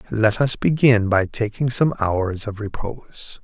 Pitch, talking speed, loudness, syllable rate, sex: 110 Hz, 155 wpm, -20 LUFS, 4.1 syllables/s, male